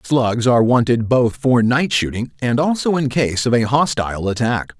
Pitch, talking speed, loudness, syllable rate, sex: 125 Hz, 190 wpm, -17 LUFS, 4.9 syllables/s, male